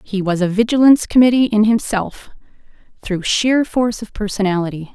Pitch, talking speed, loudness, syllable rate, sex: 215 Hz, 145 wpm, -16 LUFS, 5.6 syllables/s, female